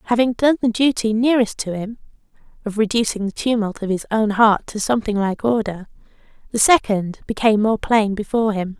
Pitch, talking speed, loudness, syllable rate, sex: 220 Hz, 175 wpm, -19 LUFS, 3.6 syllables/s, female